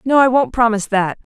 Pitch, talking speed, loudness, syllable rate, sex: 230 Hz, 220 wpm, -16 LUFS, 6.3 syllables/s, female